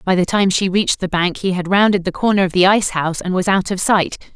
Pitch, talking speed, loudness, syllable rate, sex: 190 Hz, 290 wpm, -16 LUFS, 6.4 syllables/s, female